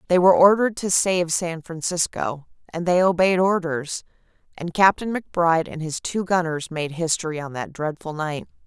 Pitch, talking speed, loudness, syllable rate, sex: 170 Hz, 165 wpm, -21 LUFS, 5.0 syllables/s, female